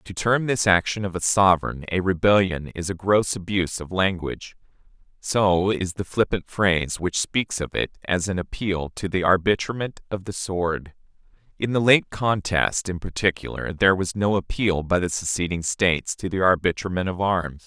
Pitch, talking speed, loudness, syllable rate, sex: 95 Hz, 175 wpm, -23 LUFS, 4.9 syllables/s, male